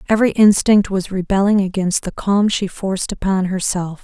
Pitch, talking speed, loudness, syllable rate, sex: 195 Hz, 165 wpm, -17 LUFS, 5.2 syllables/s, female